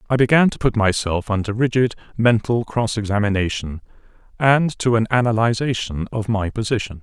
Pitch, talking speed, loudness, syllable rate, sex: 110 Hz, 145 wpm, -19 LUFS, 5.4 syllables/s, male